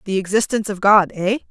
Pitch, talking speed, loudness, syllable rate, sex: 200 Hz, 200 wpm, -17 LUFS, 6.5 syllables/s, female